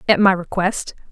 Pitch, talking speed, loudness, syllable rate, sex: 190 Hz, 160 wpm, -18 LUFS, 5.0 syllables/s, female